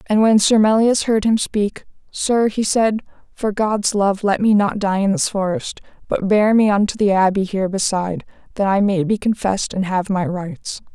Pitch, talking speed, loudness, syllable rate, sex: 205 Hz, 205 wpm, -18 LUFS, 4.8 syllables/s, female